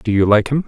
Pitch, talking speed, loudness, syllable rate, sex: 115 Hz, 360 wpm, -15 LUFS, 6.4 syllables/s, male